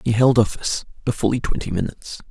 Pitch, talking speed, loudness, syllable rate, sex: 115 Hz, 180 wpm, -21 LUFS, 6.7 syllables/s, male